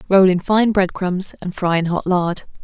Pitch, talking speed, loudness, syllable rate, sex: 185 Hz, 230 wpm, -18 LUFS, 4.5 syllables/s, female